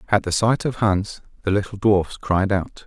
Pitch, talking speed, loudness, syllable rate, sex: 100 Hz, 210 wpm, -21 LUFS, 4.5 syllables/s, male